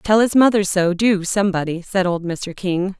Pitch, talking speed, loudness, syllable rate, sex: 190 Hz, 200 wpm, -18 LUFS, 4.8 syllables/s, female